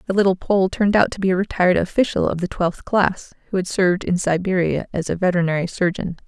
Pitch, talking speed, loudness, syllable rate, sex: 185 Hz, 220 wpm, -20 LUFS, 6.4 syllables/s, female